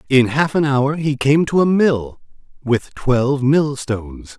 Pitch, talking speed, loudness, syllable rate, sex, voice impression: 140 Hz, 165 wpm, -17 LUFS, 4.0 syllables/s, male, masculine, adult-like, refreshing, friendly, slightly elegant